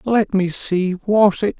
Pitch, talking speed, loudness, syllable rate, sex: 195 Hz, 150 wpm, -18 LUFS, 3.4 syllables/s, male